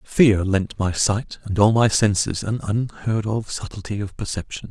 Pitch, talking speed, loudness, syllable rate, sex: 105 Hz, 180 wpm, -21 LUFS, 4.4 syllables/s, male